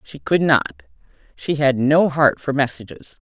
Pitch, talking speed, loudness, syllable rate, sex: 140 Hz, 165 wpm, -18 LUFS, 4.3 syllables/s, female